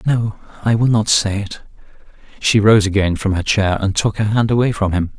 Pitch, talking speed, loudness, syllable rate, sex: 105 Hz, 210 wpm, -16 LUFS, 5.2 syllables/s, male